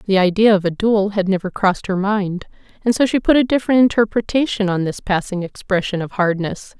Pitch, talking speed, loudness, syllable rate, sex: 200 Hz, 205 wpm, -18 LUFS, 5.7 syllables/s, female